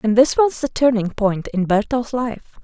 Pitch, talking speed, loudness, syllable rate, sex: 230 Hz, 205 wpm, -19 LUFS, 4.4 syllables/s, female